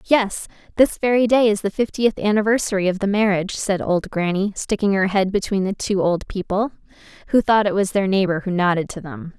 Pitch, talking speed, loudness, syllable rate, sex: 200 Hz, 205 wpm, -20 LUFS, 5.6 syllables/s, female